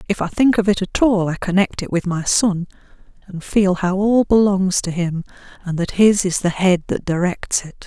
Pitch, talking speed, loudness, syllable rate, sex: 190 Hz, 220 wpm, -18 LUFS, 4.8 syllables/s, female